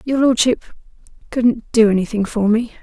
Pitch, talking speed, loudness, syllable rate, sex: 230 Hz, 150 wpm, -17 LUFS, 5.1 syllables/s, female